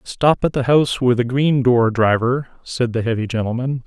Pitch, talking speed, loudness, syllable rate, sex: 125 Hz, 200 wpm, -18 LUFS, 5.0 syllables/s, male